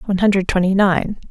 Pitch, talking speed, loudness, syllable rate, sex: 195 Hz, 185 wpm, -17 LUFS, 6.0 syllables/s, female